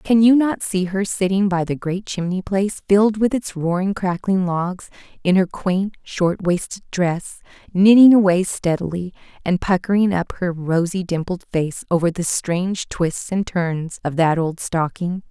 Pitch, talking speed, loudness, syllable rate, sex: 185 Hz, 170 wpm, -19 LUFS, 4.4 syllables/s, female